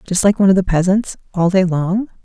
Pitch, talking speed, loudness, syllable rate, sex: 190 Hz, 240 wpm, -15 LUFS, 5.9 syllables/s, female